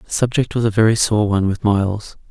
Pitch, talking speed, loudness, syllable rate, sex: 105 Hz, 235 wpm, -17 LUFS, 6.0 syllables/s, male